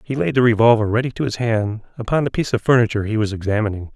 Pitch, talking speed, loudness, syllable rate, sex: 115 Hz, 240 wpm, -18 LUFS, 7.3 syllables/s, male